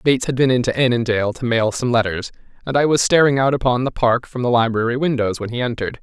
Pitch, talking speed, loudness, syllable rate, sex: 125 Hz, 240 wpm, -18 LUFS, 6.6 syllables/s, male